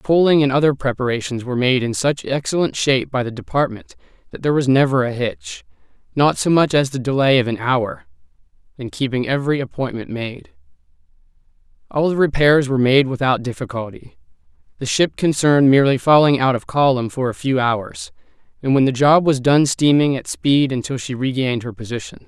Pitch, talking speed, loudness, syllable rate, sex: 135 Hz, 180 wpm, -18 LUFS, 5.8 syllables/s, male